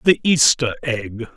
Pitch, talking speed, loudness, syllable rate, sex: 130 Hz, 130 wpm, -17 LUFS, 3.9 syllables/s, male